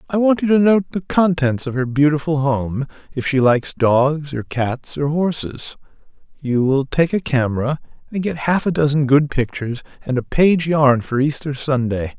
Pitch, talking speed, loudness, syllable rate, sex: 145 Hz, 185 wpm, -18 LUFS, 4.7 syllables/s, male